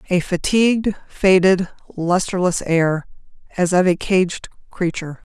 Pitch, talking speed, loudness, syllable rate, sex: 180 Hz, 115 wpm, -18 LUFS, 4.3 syllables/s, female